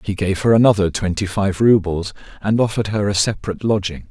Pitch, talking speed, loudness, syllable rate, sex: 100 Hz, 190 wpm, -18 LUFS, 6.2 syllables/s, male